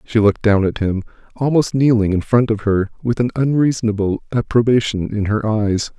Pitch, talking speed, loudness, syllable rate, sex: 110 Hz, 180 wpm, -17 LUFS, 5.3 syllables/s, male